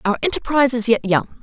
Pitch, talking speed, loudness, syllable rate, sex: 240 Hz, 210 wpm, -18 LUFS, 6.4 syllables/s, female